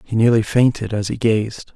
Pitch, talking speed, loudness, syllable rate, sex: 110 Hz, 205 wpm, -18 LUFS, 4.9 syllables/s, male